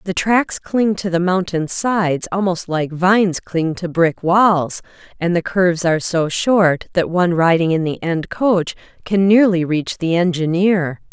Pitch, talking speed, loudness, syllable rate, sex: 180 Hz, 175 wpm, -17 LUFS, 4.3 syllables/s, female